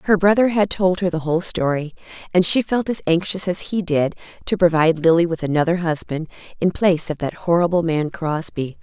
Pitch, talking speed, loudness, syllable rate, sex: 170 Hz, 195 wpm, -19 LUFS, 5.6 syllables/s, female